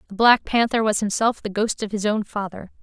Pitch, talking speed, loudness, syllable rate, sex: 210 Hz, 235 wpm, -21 LUFS, 5.5 syllables/s, female